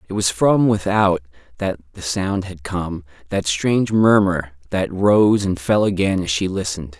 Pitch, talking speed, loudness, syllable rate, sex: 95 Hz, 170 wpm, -19 LUFS, 4.4 syllables/s, male